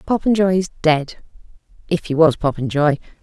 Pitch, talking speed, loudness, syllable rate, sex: 165 Hz, 110 wpm, -18 LUFS, 5.2 syllables/s, female